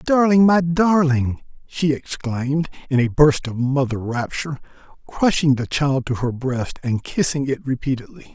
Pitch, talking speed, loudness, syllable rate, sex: 140 Hz, 150 wpm, -20 LUFS, 4.5 syllables/s, male